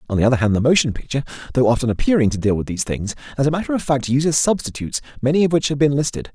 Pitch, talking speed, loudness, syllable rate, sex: 135 Hz, 265 wpm, -19 LUFS, 7.9 syllables/s, male